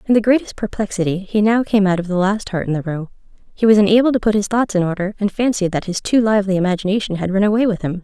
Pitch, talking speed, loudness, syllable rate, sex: 200 Hz, 270 wpm, -17 LUFS, 6.9 syllables/s, female